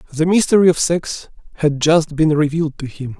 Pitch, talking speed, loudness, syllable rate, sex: 155 Hz, 190 wpm, -16 LUFS, 5.3 syllables/s, male